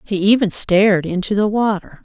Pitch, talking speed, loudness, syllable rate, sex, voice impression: 200 Hz, 175 wpm, -16 LUFS, 5.2 syllables/s, female, feminine, adult-like, slightly relaxed, powerful, soft, fluent, intellectual, calm, slightly friendly, elegant, lively, slightly sharp